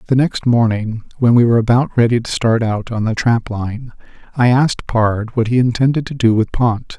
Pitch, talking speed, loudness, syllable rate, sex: 120 Hz, 215 wpm, -16 LUFS, 5.2 syllables/s, male